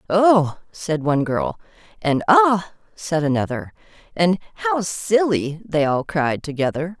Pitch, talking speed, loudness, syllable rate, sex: 170 Hz, 130 wpm, -20 LUFS, 4.0 syllables/s, female